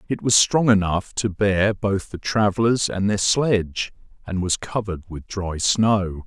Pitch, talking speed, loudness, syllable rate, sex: 100 Hz, 170 wpm, -21 LUFS, 4.2 syllables/s, male